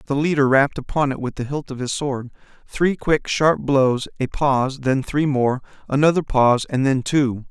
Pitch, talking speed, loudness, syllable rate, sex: 135 Hz, 190 wpm, -20 LUFS, 4.9 syllables/s, male